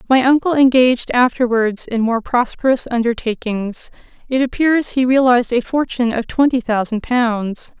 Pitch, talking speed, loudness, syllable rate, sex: 245 Hz, 140 wpm, -16 LUFS, 4.8 syllables/s, female